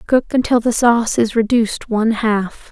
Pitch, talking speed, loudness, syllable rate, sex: 225 Hz, 175 wpm, -16 LUFS, 5.1 syllables/s, female